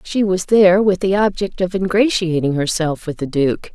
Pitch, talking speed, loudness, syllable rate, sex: 185 Hz, 190 wpm, -17 LUFS, 4.9 syllables/s, female